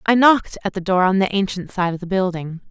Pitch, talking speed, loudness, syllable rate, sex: 190 Hz, 265 wpm, -19 LUFS, 6.1 syllables/s, female